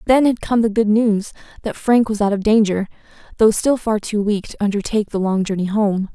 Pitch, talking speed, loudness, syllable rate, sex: 210 Hz, 225 wpm, -18 LUFS, 5.5 syllables/s, female